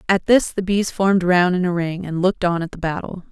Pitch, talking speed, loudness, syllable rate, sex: 180 Hz, 270 wpm, -19 LUFS, 5.8 syllables/s, female